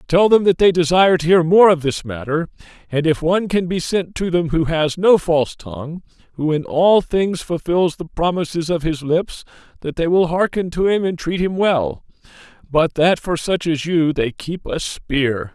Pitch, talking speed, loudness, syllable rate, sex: 165 Hz, 210 wpm, -18 LUFS, 4.7 syllables/s, male